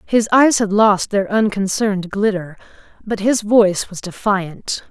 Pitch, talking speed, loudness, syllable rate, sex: 210 Hz, 145 wpm, -17 LUFS, 4.2 syllables/s, female